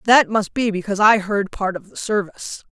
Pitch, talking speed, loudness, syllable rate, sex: 205 Hz, 220 wpm, -19 LUFS, 5.6 syllables/s, female